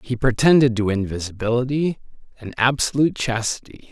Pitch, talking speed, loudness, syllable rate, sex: 120 Hz, 105 wpm, -20 LUFS, 5.6 syllables/s, male